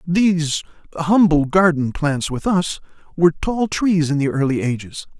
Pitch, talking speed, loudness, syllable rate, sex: 165 Hz, 150 wpm, -18 LUFS, 4.5 syllables/s, male